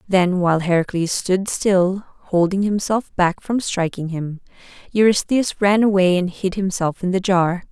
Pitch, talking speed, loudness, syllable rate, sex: 190 Hz, 155 wpm, -19 LUFS, 4.3 syllables/s, female